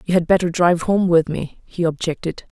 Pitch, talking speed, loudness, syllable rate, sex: 170 Hz, 210 wpm, -19 LUFS, 5.5 syllables/s, female